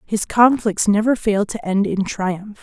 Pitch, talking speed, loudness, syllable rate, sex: 205 Hz, 185 wpm, -18 LUFS, 4.0 syllables/s, female